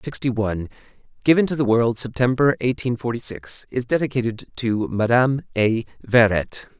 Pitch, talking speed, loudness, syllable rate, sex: 120 Hz, 140 wpm, -21 LUFS, 5.2 syllables/s, male